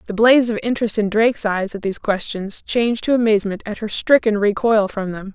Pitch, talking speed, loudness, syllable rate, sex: 215 Hz, 215 wpm, -18 LUFS, 6.0 syllables/s, female